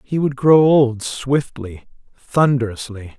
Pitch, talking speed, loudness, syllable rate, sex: 130 Hz, 115 wpm, -16 LUFS, 3.6 syllables/s, male